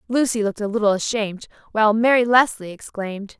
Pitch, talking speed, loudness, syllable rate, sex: 215 Hz, 160 wpm, -20 LUFS, 6.5 syllables/s, female